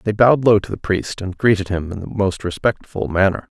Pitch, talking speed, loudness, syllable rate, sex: 100 Hz, 235 wpm, -18 LUFS, 5.5 syllables/s, male